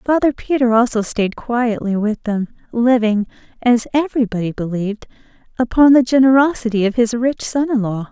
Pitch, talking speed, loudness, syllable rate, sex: 235 Hz, 150 wpm, -16 LUFS, 5.3 syllables/s, female